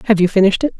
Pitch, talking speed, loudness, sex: 200 Hz, 300 wpm, -14 LUFS, female